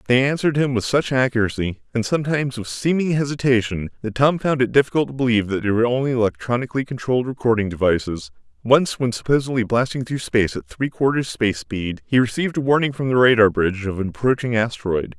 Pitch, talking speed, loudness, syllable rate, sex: 120 Hz, 195 wpm, -20 LUFS, 6.5 syllables/s, male